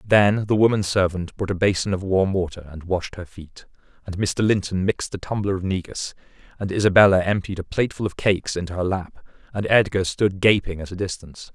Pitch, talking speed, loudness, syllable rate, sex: 95 Hz, 205 wpm, -22 LUFS, 5.8 syllables/s, male